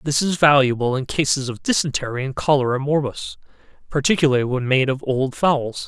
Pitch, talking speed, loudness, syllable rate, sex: 135 Hz, 165 wpm, -19 LUFS, 5.5 syllables/s, male